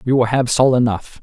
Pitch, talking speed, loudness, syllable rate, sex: 125 Hz, 245 wpm, -16 LUFS, 5.4 syllables/s, male